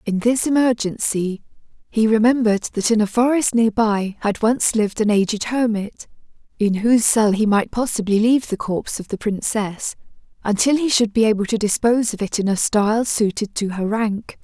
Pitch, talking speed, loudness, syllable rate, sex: 220 Hz, 185 wpm, -19 LUFS, 5.2 syllables/s, female